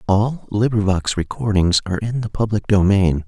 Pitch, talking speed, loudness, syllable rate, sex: 105 Hz, 145 wpm, -18 LUFS, 5.0 syllables/s, male